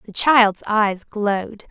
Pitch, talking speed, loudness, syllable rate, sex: 210 Hz, 140 wpm, -18 LUFS, 3.3 syllables/s, female